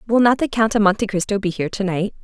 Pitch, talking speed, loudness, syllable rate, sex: 205 Hz, 295 wpm, -19 LUFS, 6.9 syllables/s, female